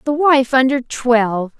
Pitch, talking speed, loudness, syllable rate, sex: 260 Hz, 150 wpm, -15 LUFS, 4.2 syllables/s, female